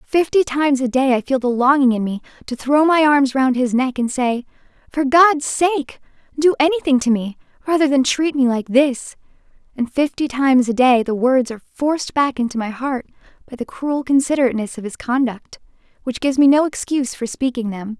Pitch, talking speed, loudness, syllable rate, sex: 265 Hz, 200 wpm, -18 LUFS, 5.4 syllables/s, female